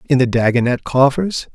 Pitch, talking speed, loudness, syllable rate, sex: 135 Hz, 155 wpm, -16 LUFS, 5.6 syllables/s, male